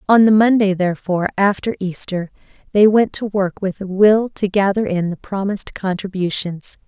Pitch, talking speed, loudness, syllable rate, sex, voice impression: 195 Hz, 165 wpm, -17 LUFS, 5.1 syllables/s, female, feminine, adult-like, tensed, clear, fluent, intellectual, slightly calm, elegant, slightly lively, slightly strict, slightly sharp